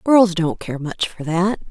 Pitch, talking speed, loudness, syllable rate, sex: 180 Hz, 210 wpm, -19 LUFS, 4.0 syllables/s, female